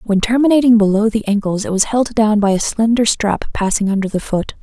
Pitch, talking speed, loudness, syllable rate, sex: 215 Hz, 220 wpm, -15 LUFS, 5.7 syllables/s, female